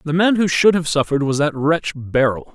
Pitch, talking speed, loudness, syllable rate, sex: 155 Hz, 235 wpm, -17 LUFS, 5.4 syllables/s, male